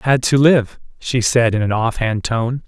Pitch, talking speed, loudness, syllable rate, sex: 120 Hz, 245 wpm, -16 LUFS, 4.6 syllables/s, male